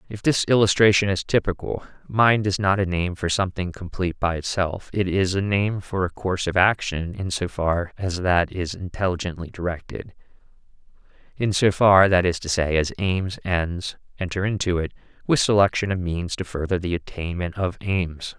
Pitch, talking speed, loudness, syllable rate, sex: 90 Hz, 180 wpm, -22 LUFS, 5.0 syllables/s, male